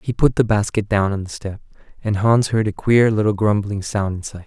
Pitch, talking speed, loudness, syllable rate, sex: 105 Hz, 230 wpm, -19 LUFS, 5.5 syllables/s, male